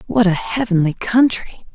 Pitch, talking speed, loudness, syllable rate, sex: 210 Hz, 140 wpm, -17 LUFS, 4.6 syllables/s, female